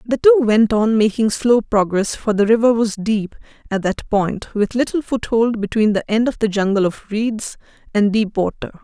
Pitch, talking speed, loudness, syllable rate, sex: 220 Hz, 195 wpm, -17 LUFS, 4.6 syllables/s, female